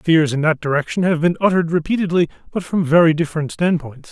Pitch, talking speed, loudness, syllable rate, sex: 165 Hz, 190 wpm, -18 LUFS, 6.4 syllables/s, male